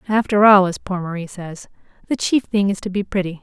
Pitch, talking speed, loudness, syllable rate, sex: 195 Hz, 230 wpm, -18 LUFS, 5.6 syllables/s, female